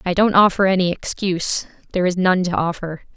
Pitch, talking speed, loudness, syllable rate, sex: 185 Hz, 190 wpm, -18 LUFS, 6.0 syllables/s, female